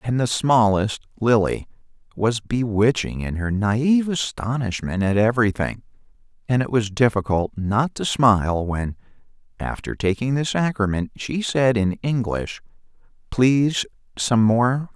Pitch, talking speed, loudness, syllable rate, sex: 115 Hz, 125 wpm, -21 LUFS, 4.3 syllables/s, male